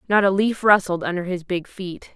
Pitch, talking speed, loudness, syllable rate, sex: 190 Hz, 225 wpm, -20 LUFS, 5.1 syllables/s, female